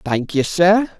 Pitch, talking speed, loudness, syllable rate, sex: 175 Hz, 180 wpm, -16 LUFS, 3.6 syllables/s, male